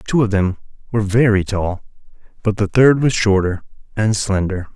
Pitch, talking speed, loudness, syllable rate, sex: 105 Hz, 165 wpm, -17 LUFS, 5.1 syllables/s, male